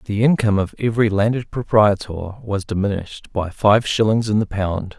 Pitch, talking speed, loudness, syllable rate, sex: 105 Hz, 170 wpm, -19 LUFS, 5.1 syllables/s, male